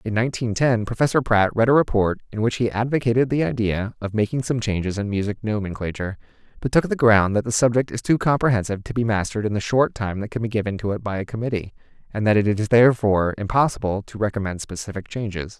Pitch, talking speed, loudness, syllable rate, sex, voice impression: 110 Hz, 220 wpm, -21 LUFS, 6.5 syllables/s, male, masculine, adult-like, slightly thin, tensed, slightly powerful, bright, fluent, intellectual, refreshing, friendly, reassuring, slightly wild, lively, kind, light